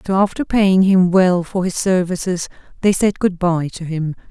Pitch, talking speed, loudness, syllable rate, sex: 185 Hz, 195 wpm, -17 LUFS, 4.6 syllables/s, female